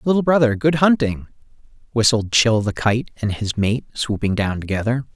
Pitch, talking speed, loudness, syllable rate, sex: 115 Hz, 165 wpm, -19 LUFS, 5.0 syllables/s, male